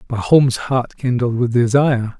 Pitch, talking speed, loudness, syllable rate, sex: 125 Hz, 135 wpm, -16 LUFS, 4.5 syllables/s, male